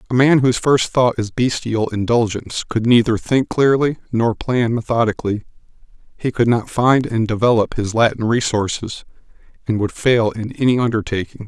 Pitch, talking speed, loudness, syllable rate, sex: 115 Hz, 155 wpm, -17 LUFS, 5.2 syllables/s, male